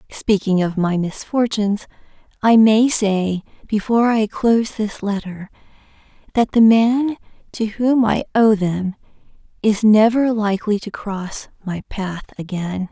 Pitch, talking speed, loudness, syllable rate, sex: 210 Hz, 130 wpm, -18 LUFS, 4.2 syllables/s, female